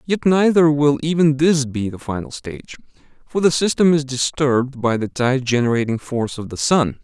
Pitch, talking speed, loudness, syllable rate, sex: 140 Hz, 190 wpm, -18 LUFS, 5.2 syllables/s, male